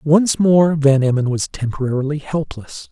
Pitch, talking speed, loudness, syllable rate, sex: 145 Hz, 145 wpm, -17 LUFS, 4.5 syllables/s, male